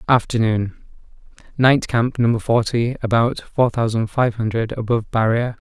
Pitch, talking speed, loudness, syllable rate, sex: 115 Hz, 115 wpm, -19 LUFS, 4.6 syllables/s, male